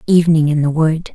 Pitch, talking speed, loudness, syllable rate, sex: 160 Hz, 210 wpm, -14 LUFS, 6.1 syllables/s, female